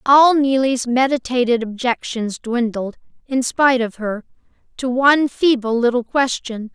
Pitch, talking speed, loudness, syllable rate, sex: 250 Hz, 125 wpm, -18 LUFS, 4.5 syllables/s, female